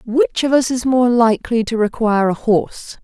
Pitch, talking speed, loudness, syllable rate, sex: 230 Hz, 195 wpm, -16 LUFS, 5.2 syllables/s, female